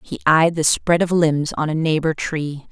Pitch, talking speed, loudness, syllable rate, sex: 155 Hz, 220 wpm, -18 LUFS, 4.4 syllables/s, female